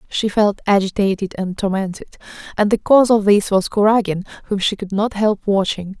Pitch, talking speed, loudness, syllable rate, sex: 200 Hz, 180 wpm, -17 LUFS, 5.4 syllables/s, female